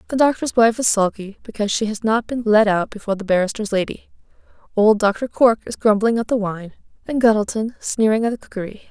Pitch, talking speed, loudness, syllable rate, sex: 215 Hz, 200 wpm, -19 LUFS, 6.1 syllables/s, female